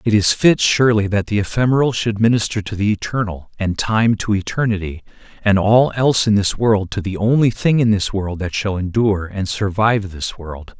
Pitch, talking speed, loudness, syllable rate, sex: 105 Hz, 200 wpm, -17 LUFS, 5.3 syllables/s, male